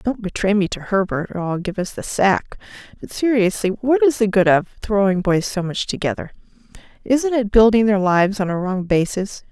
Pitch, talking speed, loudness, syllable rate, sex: 205 Hz, 200 wpm, -18 LUFS, 5.2 syllables/s, female